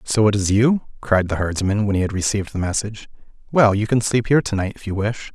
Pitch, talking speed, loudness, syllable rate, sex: 105 Hz, 260 wpm, -19 LUFS, 6.2 syllables/s, male